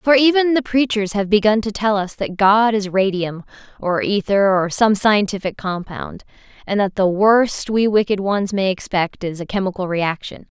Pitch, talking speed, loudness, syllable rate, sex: 205 Hz, 180 wpm, -18 LUFS, 4.6 syllables/s, female